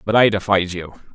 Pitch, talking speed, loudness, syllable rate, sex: 100 Hz, 210 wpm, -18 LUFS, 5.3 syllables/s, male